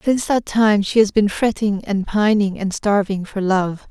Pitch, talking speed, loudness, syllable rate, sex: 205 Hz, 200 wpm, -18 LUFS, 4.5 syllables/s, female